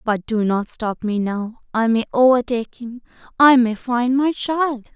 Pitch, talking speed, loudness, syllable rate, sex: 240 Hz, 155 wpm, -19 LUFS, 4.3 syllables/s, female